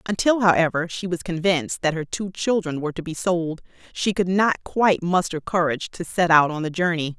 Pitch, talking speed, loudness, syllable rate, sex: 175 Hz, 210 wpm, -22 LUFS, 5.5 syllables/s, female